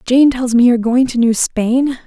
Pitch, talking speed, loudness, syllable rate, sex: 245 Hz, 260 wpm, -13 LUFS, 5.2 syllables/s, female